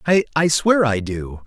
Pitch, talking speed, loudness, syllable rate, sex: 140 Hz, 165 wpm, -18 LUFS, 3.7 syllables/s, male